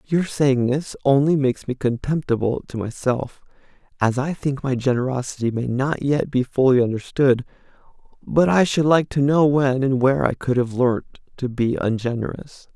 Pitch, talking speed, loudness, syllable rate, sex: 130 Hz, 170 wpm, -20 LUFS, 4.9 syllables/s, male